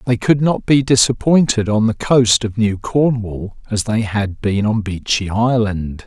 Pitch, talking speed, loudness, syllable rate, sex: 110 Hz, 180 wpm, -16 LUFS, 4.1 syllables/s, male